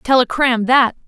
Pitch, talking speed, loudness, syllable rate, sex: 250 Hz, 225 wpm, -14 LUFS, 4.2 syllables/s, female